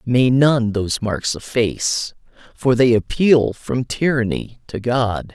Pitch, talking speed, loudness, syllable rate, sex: 120 Hz, 135 wpm, -18 LUFS, 3.8 syllables/s, male